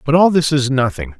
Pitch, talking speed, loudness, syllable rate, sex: 135 Hz, 250 wpm, -15 LUFS, 5.6 syllables/s, male